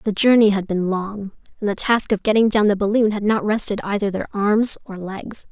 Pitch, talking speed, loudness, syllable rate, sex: 205 Hz, 230 wpm, -19 LUFS, 5.3 syllables/s, female